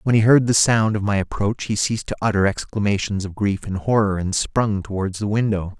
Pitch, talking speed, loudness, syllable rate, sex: 105 Hz, 230 wpm, -20 LUFS, 5.5 syllables/s, male